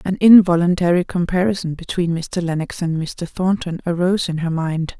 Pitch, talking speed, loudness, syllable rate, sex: 175 Hz, 155 wpm, -18 LUFS, 5.2 syllables/s, female